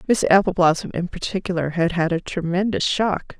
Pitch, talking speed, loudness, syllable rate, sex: 180 Hz, 160 wpm, -21 LUFS, 5.3 syllables/s, female